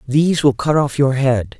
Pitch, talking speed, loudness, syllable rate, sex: 135 Hz, 225 wpm, -16 LUFS, 4.8 syllables/s, male